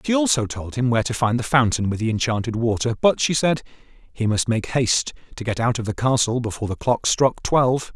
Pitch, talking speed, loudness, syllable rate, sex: 120 Hz, 235 wpm, -21 LUFS, 5.8 syllables/s, male